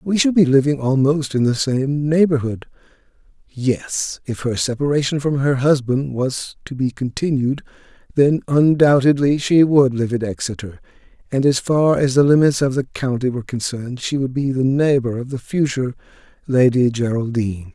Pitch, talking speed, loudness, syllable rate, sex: 135 Hz, 160 wpm, -18 LUFS, 5.0 syllables/s, male